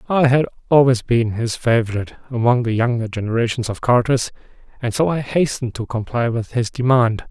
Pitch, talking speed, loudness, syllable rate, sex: 120 Hz, 170 wpm, -19 LUFS, 5.7 syllables/s, male